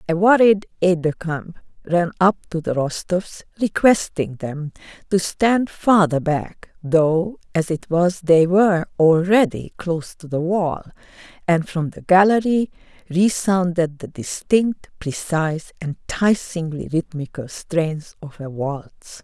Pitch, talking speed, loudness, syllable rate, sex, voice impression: 175 Hz, 130 wpm, -20 LUFS, 3.8 syllables/s, female, feminine, slightly old, slightly relaxed, soft, slightly halting, friendly, reassuring, elegant, slightly lively, kind, modest